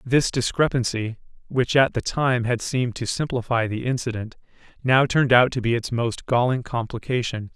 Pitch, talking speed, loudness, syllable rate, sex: 120 Hz, 165 wpm, -22 LUFS, 5.1 syllables/s, male